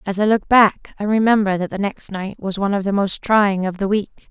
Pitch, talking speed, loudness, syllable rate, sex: 200 Hz, 265 wpm, -18 LUFS, 5.6 syllables/s, female